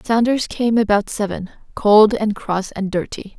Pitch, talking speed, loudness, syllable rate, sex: 210 Hz, 160 wpm, -18 LUFS, 4.3 syllables/s, female